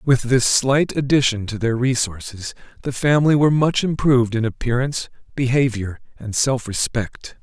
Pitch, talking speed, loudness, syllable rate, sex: 125 Hz, 145 wpm, -19 LUFS, 4.9 syllables/s, male